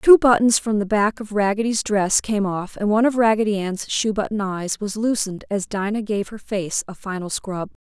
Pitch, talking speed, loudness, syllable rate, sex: 205 Hz, 215 wpm, -21 LUFS, 5.1 syllables/s, female